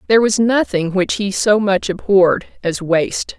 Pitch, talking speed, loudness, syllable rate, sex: 195 Hz, 175 wpm, -16 LUFS, 4.7 syllables/s, female